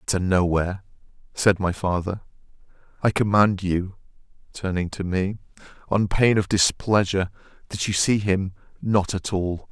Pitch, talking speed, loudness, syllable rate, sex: 95 Hz, 135 wpm, -23 LUFS, 4.6 syllables/s, male